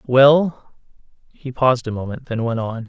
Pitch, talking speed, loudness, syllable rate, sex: 125 Hz, 165 wpm, -18 LUFS, 4.5 syllables/s, male